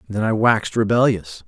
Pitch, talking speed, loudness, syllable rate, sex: 105 Hz, 160 wpm, -18 LUFS, 5.4 syllables/s, male